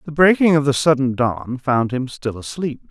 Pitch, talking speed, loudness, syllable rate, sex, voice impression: 135 Hz, 205 wpm, -18 LUFS, 4.9 syllables/s, male, masculine, middle-aged, tensed, slightly powerful, hard, slightly muffled, intellectual, calm, slightly mature, slightly wild, slightly strict